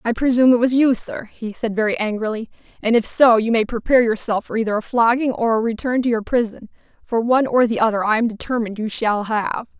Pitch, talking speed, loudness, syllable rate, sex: 230 Hz, 235 wpm, -19 LUFS, 6.2 syllables/s, female